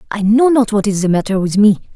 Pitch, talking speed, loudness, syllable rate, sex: 210 Hz, 275 wpm, -13 LUFS, 5.9 syllables/s, female